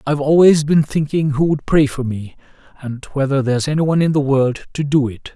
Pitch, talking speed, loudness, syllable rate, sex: 140 Hz, 225 wpm, -16 LUFS, 5.9 syllables/s, male